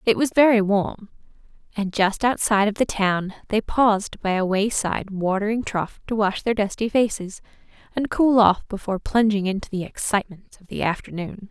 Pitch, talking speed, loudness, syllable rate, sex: 205 Hz, 170 wpm, -22 LUFS, 5.2 syllables/s, female